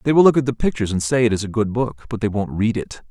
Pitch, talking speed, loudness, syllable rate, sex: 115 Hz, 350 wpm, -20 LUFS, 6.9 syllables/s, male